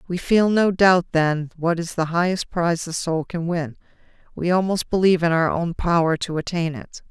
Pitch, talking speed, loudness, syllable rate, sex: 170 Hz, 205 wpm, -21 LUFS, 5.1 syllables/s, female